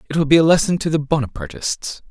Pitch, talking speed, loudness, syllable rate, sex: 150 Hz, 230 wpm, -18 LUFS, 6.5 syllables/s, male